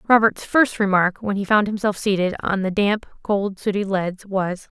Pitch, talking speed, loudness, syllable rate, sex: 200 Hz, 190 wpm, -21 LUFS, 4.6 syllables/s, female